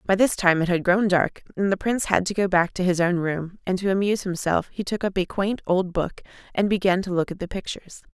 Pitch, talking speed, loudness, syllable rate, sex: 190 Hz, 265 wpm, -23 LUFS, 5.9 syllables/s, female